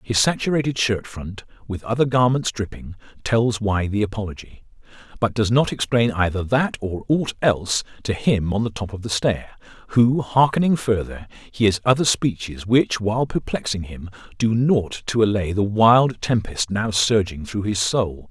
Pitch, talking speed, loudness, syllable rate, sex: 110 Hz, 165 wpm, -21 LUFS, 4.6 syllables/s, male